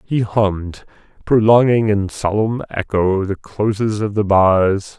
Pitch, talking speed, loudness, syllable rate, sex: 105 Hz, 130 wpm, -16 LUFS, 3.8 syllables/s, male